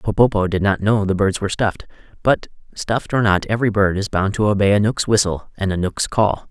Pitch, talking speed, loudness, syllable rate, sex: 100 Hz, 230 wpm, -18 LUFS, 5.9 syllables/s, male